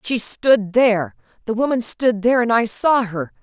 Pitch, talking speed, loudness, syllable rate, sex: 225 Hz, 195 wpm, -18 LUFS, 4.8 syllables/s, female